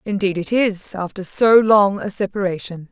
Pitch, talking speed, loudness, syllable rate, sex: 200 Hz, 165 wpm, -18 LUFS, 4.6 syllables/s, female